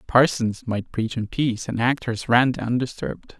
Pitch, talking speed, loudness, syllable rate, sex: 115 Hz, 160 wpm, -23 LUFS, 4.6 syllables/s, male